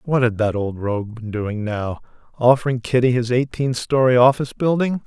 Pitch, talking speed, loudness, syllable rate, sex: 120 Hz, 165 wpm, -19 LUFS, 5.3 syllables/s, male